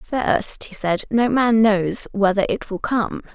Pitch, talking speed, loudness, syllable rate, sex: 210 Hz, 180 wpm, -20 LUFS, 3.6 syllables/s, female